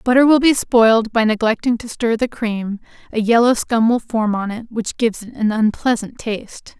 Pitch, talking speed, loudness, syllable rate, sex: 225 Hz, 205 wpm, -17 LUFS, 5.1 syllables/s, female